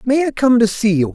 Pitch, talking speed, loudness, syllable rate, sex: 230 Hz, 315 wpm, -15 LUFS, 5.7 syllables/s, male